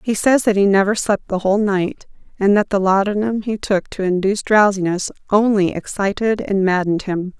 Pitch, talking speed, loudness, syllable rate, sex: 200 Hz, 185 wpm, -17 LUFS, 5.3 syllables/s, female